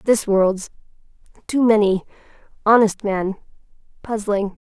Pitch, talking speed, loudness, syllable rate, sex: 210 Hz, 50 wpm, -19 LUFS, 4.0 syllables/s, female